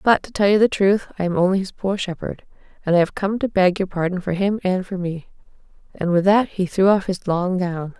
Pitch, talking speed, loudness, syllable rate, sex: 190 Hz, 255 wpm, -20 LUFS, 5.5 syllables/s, female